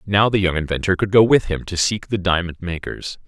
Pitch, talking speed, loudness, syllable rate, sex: 95 Hz, 240 wpm, -19 LUFS, 5.5 syllables/s, male